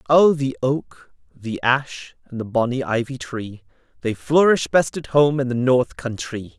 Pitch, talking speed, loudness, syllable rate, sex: 130 Hz, 175 wpm, -20 LUFS, 4.1 syllables/s, male